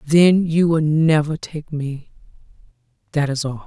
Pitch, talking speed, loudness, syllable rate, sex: 150 Hz, 145 wpm, -19 LUFS, 3.9 syllables/s, female